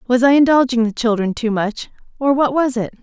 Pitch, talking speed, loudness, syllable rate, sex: 245 Hz, 220 wpm, -16 LUFS, 5.6 syllables/s, female